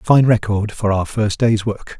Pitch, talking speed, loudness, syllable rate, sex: 110 Hz, 240 wpm, -17 LUFS, 4.6 syllables/s, male